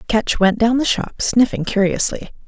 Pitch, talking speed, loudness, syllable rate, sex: 220 Hz, 170 wpm, -17 LUFS, 4.6 syllables/s, female